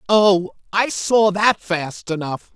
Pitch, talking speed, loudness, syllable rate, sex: 195 Hz, 140 wpm, -19 LUFS, 3.2 syllables/s, female